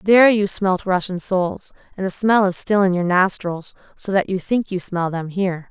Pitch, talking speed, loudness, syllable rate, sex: 190 Hz, 220 wpm, -19 LUFS, 4.8 syllables/s, female